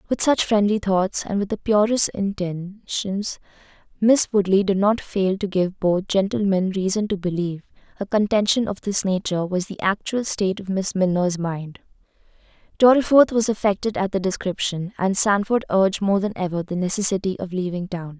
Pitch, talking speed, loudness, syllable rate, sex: 195 Hz, 170 wpm, -21 LUFS, 5.1 syllables/s, female